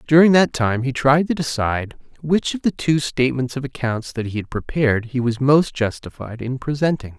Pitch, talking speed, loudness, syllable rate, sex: 130 Hz, 200 wpm, -20 LUFS, 5.3 syllables/s, male